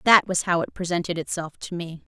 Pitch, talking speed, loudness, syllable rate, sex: 175 Hz, 225 wpm, -24 LUFS, 5.7 syllables/s, female